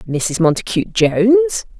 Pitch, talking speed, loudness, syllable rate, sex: 210 Hz, 100 wpm, -15 LUFS, 4.2 syllables/s, female